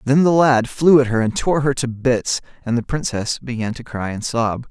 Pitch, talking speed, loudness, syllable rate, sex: 125 Hz, 240 wpm, -18 LUFS, 4.9 syllables/s, male